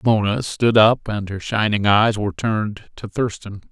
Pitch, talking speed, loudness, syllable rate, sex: 110 Hz, 180 wpm, -19 LUFS, 4.7 syllables/s, male